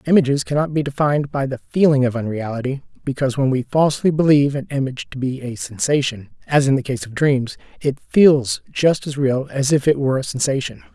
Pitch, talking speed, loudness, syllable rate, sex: 135 Hz, 205 wpm, -19 LUFS, 6.0 syllables/s, male